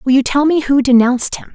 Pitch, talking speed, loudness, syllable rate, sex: 260 Hz, 270 wpm, -13 LUFS, 6.3 syllables/s, female